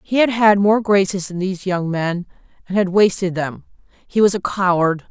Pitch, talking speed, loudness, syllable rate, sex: 190 Hz, 200 wpm, -18 LUFS, 5.0 syllables/s, female